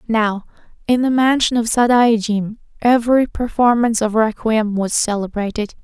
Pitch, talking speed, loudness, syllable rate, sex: 225 Hz, 125 wpm, -16 LUFS, 4.8 syllables/s, female